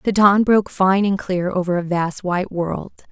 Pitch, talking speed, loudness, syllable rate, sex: 190 Hz, 210 wpm, -18 LUFS, 5.0 syllables/s, female